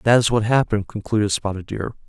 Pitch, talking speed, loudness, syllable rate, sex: 110 Hz, 200 wpm, -21 LUFS, 6.5 syllables/s, male